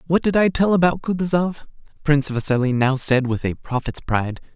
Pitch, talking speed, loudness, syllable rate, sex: 150 Hz, 185 wpm, -20 LUFS, 5.8 syllables/s, male